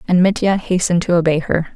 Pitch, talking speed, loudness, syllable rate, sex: 175 Hz, 205 wpm, -16 LUFS, 6.4 syllables/s, female